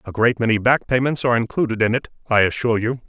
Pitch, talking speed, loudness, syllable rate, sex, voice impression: 115 Hz, 235 wpm, -19 LUFS, 7.0 syllables/s, male, very masculine, slightly old, thick, muffled, slightly intellectual, sincere